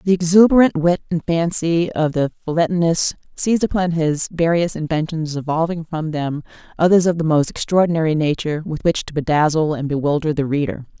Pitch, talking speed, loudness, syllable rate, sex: 160 Hz, 165 wpm, -18 LUFS, 5.6 syllables/s, female